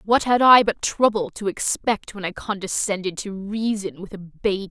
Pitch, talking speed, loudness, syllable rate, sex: 200 Hz, 190 wpm, -21 LUFS, 4.8 syllables/s, female